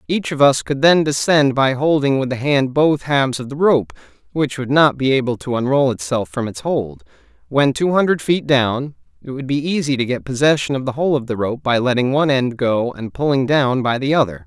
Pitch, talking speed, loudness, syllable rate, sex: 135 Hz, 230 wpm, -17 LUFS, 5.4 syllables/s, male